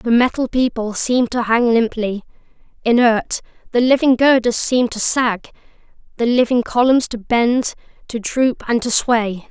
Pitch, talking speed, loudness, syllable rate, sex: 235 Hz, 150 wpm, -17 LUFS, 4.6 syllables/s, female